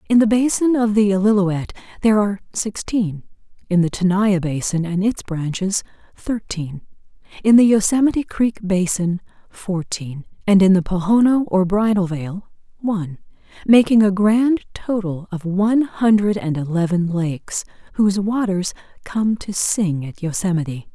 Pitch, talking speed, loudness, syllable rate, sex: 195 Hz, 135 wpm, -19 LUFS, 4.7 syllables/s, female